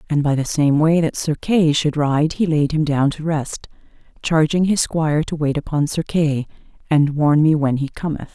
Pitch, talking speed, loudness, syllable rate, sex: 150 Hz, 215 wpm, -18 LUFS, 4.8 syllables/s, female